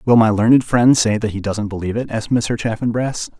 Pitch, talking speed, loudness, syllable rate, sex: 110 Hz, 230 wpm, -17 LUFS, 5.9 syllables/s, male